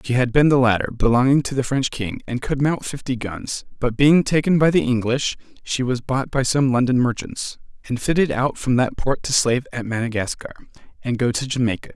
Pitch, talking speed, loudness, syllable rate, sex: 130 Hz, 210 wpm, -20 LUFS, 5.5 syllables/s, male